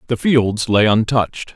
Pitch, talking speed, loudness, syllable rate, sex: 115 Hz, 155 wpm, -16 LUFS, 4.4 syllables/s, male